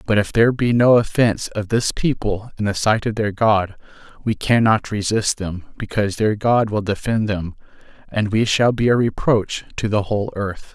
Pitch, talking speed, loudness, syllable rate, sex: 105 Hz, 195 wpm, -19 LUFS, 5.0 syllables/s, male